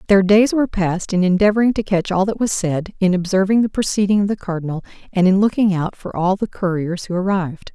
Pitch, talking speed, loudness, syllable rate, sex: 190 Hz, 225 wpm, -18 LUFS, 6.1 syllables/s, female